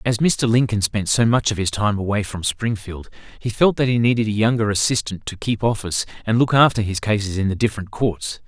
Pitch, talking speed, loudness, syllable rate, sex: 110 Hz, 225 wpm, -20 LUFS, 5.7 syllables/s, male